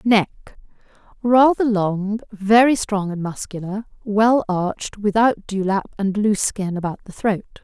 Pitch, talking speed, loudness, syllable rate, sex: 205 Hz, 125 wpm, -20 LUFS, 4.0 syllables/s, female